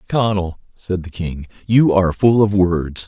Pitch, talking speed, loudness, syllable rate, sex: 95 Hz, 175 wpm, -17 LUFS, 4.3 syllables/s, male